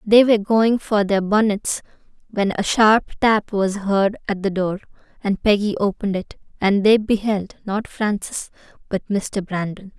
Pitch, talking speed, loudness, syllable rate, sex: 205 Hz, 160 wpm, -20 LUFS, 4.5 syllables/s, female